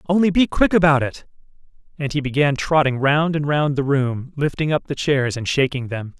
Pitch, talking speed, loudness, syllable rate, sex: 145 Hz, 205 wpm, -19 LUFS, 5.2 syllables/s, male